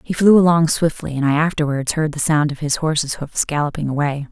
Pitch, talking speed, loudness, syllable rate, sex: 150 Hz, 220 wpm, -18 LUFS, 5.7 syllables/s, female